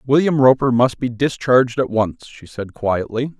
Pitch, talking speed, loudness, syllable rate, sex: 125 Hz, 175 wpm, -17 LUFS, 4.6 syllables/s, male